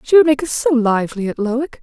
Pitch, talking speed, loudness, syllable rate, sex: 255 Hz, 265 wpm, -16 LUFS, 6.4 syllables/s, female